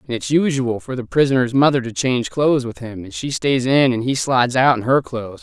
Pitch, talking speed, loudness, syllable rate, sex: 130 Hz, 255 wpm, -18 LUFS, 5.9 syllables/s, male